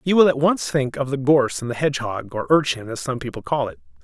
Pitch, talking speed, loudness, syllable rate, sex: 135 Hz, 270 wpm, -21 LUFS, 6.2 syllables/s, male